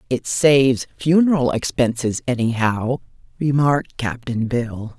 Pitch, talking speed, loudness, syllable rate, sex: 130 Hz, 95 wpm, -19 LUFS, 4.0 syllables/s, female